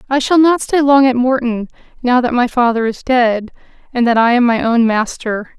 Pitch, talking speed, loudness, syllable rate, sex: 245 Hz, 215 wpm, -14 LUFS, 5.0 syllables/s, female